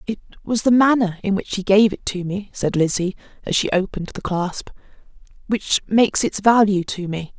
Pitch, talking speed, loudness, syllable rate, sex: 200 Hz, 195 wpm, -19 LUFS, 5.2 syllables/s, female